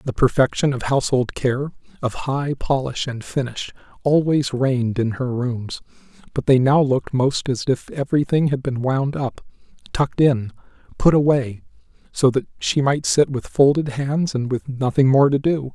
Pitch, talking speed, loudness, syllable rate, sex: 135 Hz, 170 wpm, -20 LUFS, 5.0 syllables/s, male